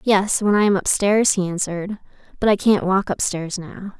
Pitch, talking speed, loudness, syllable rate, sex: 195 Hz, 225 wpm, -19 LUFS, 5.4 syllables/s, female